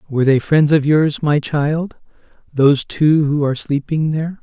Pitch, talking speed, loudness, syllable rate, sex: 150 Hz, 175 wpm, -16 LUFS, 4.9 syllables/s, male